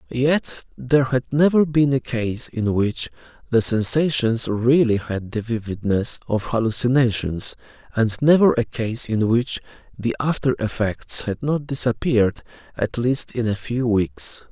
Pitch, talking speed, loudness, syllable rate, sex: 120 Hz, 145 wpm, -20 LUFS, 4.2 syllables/s, male